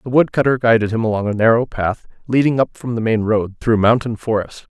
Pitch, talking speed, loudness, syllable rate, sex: 115 Hz, 215 wpm, -17 LUFS, 5.7 syllables/s, male